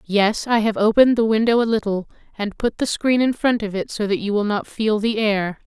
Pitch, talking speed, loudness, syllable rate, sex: 215 Hz, 250 wpm, -20 LUFS, 5.4 syllables/s, female